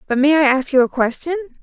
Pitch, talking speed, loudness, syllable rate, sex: 285 Hz, 260 wpm, -16 LUFS, 6.6 syllables/s, female